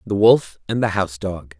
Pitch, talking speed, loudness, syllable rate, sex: 100 Hz, 225 wpm, -19 LUFS, 5.0 syllables/s, male